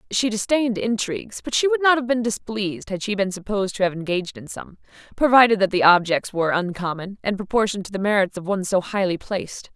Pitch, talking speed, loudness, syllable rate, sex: 205 Hz, 215 wpm, -21 LUFS, 6.4 syllables/s, female